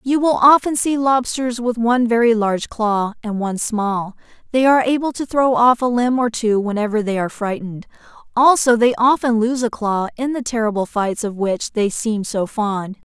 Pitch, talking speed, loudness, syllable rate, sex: 230 Hz, 195 wpm, -18 LUFS, 5.1 syllables/s, female